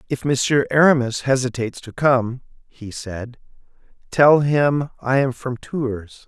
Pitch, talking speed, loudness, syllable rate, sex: 130 Hz, 135 wpm, -19 LUFS, 4.0 syllables/s, male